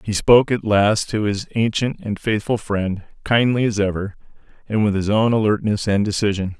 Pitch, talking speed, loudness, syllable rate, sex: 105 Hz, 180 wpm, -19 LUFS, 5.1 syllables/s, male